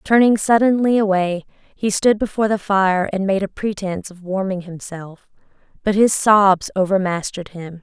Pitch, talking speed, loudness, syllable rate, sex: 195 Hz, 155 wpm, -18 LUFS, 4.8 syllables/s, female